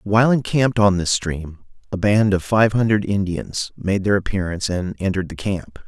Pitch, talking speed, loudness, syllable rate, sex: 100 Hz, 185 wpm, -20 LUFS, 5.2 syllables/s, male